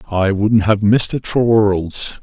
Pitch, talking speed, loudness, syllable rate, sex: 105 Hz, 190 wpm, -15 LUFS, 4.0 syllables/s, male